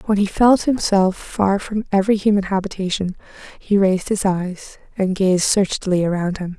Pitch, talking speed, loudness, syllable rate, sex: 195 Hz, 165 wpm, -18 LUFS, 5.0 syllables/s, female